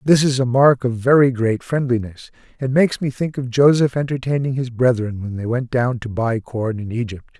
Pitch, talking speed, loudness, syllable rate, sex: 125 Hz, 210 wpm, -19 LUFS, 5.3 syllables/s, male